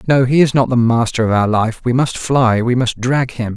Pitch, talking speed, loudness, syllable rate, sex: 120 Hz, 270 wpm, -15 LUFS, 5.0 syllables/s, male